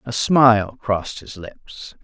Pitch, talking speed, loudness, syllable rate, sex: 110 Hz, 145 wpm, -17 LUFS, 3.7 syllables/s, male